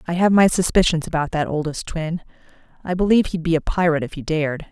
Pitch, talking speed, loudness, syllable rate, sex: 165 Hz, 215 wpm, -20 LUFS, 6.6 syllables/s, female